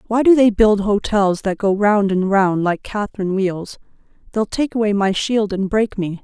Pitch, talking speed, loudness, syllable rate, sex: 205 Hz, 200 wpm, -17 LUFS, 4.7 syllables/s, female